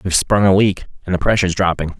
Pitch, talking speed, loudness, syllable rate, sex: 95 Hz, 240 wpm, -16 LUFS, 7.1 syllables/s, male